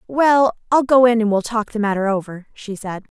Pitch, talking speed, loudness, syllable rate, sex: 225 Hz, 225 wpm, -17 LUFS, 5.1 syllables/s, female